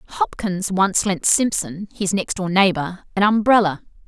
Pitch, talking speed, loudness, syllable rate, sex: 195 Hz, 145 wpm, -19 LUFS, 4.5 syllables/s, female